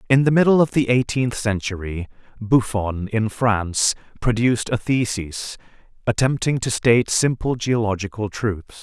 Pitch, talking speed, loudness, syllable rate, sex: 115 Hz, 130 wpm, -20 LUFS, 4.6 syllables/s, male